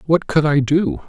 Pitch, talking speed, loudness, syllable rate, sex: 150 Hz, 220 wpm, -17 LUFS, 4.4 syllables/s, male